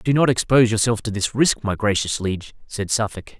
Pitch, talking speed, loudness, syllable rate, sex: 110 Hz, 210 wpm, -20 LUFS, 5.6 syllables/s, male